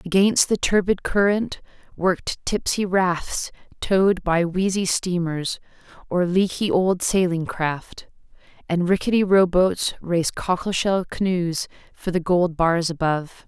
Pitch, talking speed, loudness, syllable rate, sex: 180 Hz, 130 wpm, -21 LUFS, 4.1 syllables/s, female